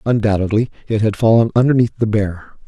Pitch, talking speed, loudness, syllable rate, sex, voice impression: 110 Hz, 155 wpm, -16 LUFS, 6.1 syllables/s, male, very masculine, old, relaxed, slightly weak, slightly bright, slightly soft, clear, fluent, cool, very intellectual, refreshing, sincere, very calm, very mature, very friendly, very reassuring, very unique, very elegant, slightly wild, sweet, lively, kind, slightly intense, slightly sharp